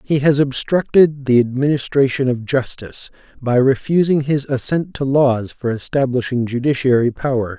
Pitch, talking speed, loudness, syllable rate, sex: 130 Hz, 135 wpm, -17 LUFS, 4.9 syllables/s, male